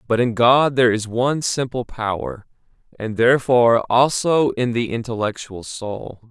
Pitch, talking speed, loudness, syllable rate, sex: 120 Hz, 145 wpm, -19 LUFS, 4.7 syllables/s, male